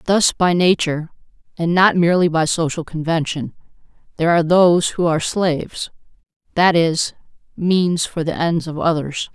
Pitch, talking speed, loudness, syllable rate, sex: 170 Hz, 140 wpm, -18 LUFS, 5.1 syllables/s, female